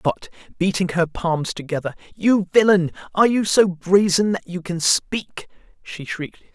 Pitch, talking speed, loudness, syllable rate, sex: 180 Hz, 155 wpm, -20 LUFS, 4.5 syllables/s, male